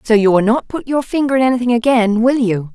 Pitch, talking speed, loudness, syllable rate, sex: 235 Hz, 260 wpm, -15 LUFS, 6.0 syllables/s, female